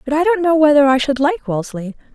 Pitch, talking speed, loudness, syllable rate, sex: 285 Hz, 250 wpm, -15 LUFS, 6.4 syllables/s, female